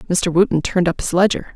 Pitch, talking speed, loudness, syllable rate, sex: 175 Hz, 230 wpm, -17 LUFS, 6.0 syllables/s, female